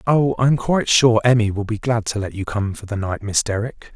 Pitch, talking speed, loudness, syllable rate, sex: 115 Hz, 260 wpm, -19 LUFS, 5.6 syllables/s, male